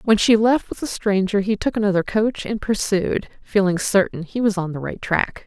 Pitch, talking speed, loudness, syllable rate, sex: 205 Hz, 220 wpm, -20 LUFS, 5.0 syllables/s, female